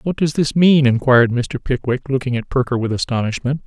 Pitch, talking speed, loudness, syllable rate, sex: 130 Hz, 195 wpm, -17 LUFS, 5.6 syllables/s, male